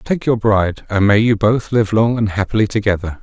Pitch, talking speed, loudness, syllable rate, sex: 105 Hz, 225 wpm, -16 LUFS, 5.4 syllables/s, male